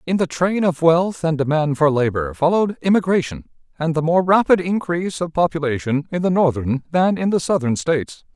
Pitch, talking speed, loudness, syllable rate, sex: 160 Hz, 185 wpm, -19 LUFS, 5.5 syllables/s, male